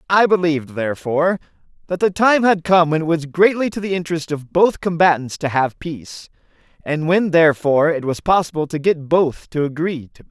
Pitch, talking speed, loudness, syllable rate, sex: 165 Hz, 200 wpm, -18 LUFS, 5.7 syllables/s, male